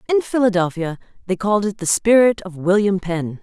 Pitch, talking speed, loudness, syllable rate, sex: 195 Hz, 175 wpm, -18 LUFS, 5.5 syllables/s, female